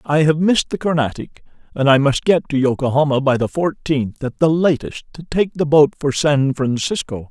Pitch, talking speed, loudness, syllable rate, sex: 145 Hz, 195 wpm, -17 LUFS, 5.0 syllables/s, male